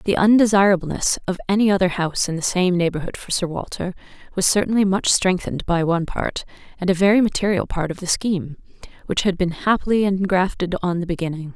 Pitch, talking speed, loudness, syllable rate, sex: 185 Hz, 185 wpm, -20 LUFS, 6.1 syllables/s, female